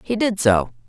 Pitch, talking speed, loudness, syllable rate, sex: 165 Hz, 205 wpm, -19 LUFS, 4.8 syllables/s, female